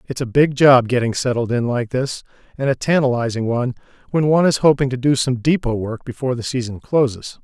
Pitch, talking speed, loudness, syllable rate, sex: 130 Hz, 210 wpm, -18 LUFS, 5.9 syllables/s, male